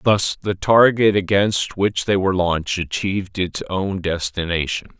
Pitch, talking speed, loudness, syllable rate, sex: 95 Hz, 145 wpm, -19 LUFS, 4.5 syllables/s, male